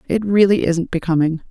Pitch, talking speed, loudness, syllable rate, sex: 180 Hz, 160 wpm, -17 LUFS, 5.4 syllables/s, female